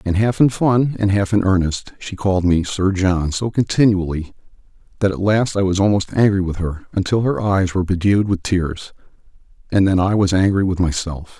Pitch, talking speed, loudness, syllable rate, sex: 95 Hz, 200 wpm, -18 LUFS, 5.3 syllables/s, male